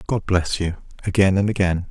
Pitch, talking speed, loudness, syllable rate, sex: 95 Hz, 190 wpm, -21 LUFS, 5.5 syllables/s, male